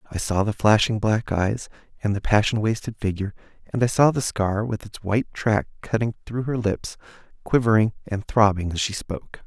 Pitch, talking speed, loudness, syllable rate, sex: 105 Hz, 190 wpm, -23 LUFS, 5.3 syllables/s, male